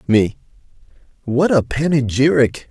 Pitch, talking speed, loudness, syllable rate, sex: 135 Hz, 90 wpm, -17 LUFS, 4.2 syllables/s, male